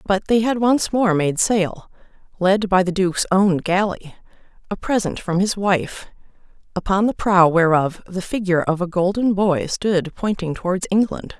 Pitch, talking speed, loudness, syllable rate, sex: 190 Hz, 170 wpm, -19 LUFS, 4.6 syllables/s, female